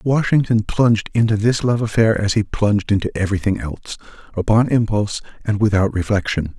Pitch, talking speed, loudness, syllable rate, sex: 105 Hz, 145 wpm, -18 LUFS, 6.0 syllables/s, male